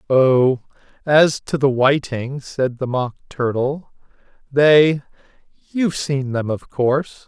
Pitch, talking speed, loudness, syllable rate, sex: 135 Hz, 115 wpm, -18 LUFS, 3.5 syllables/s, male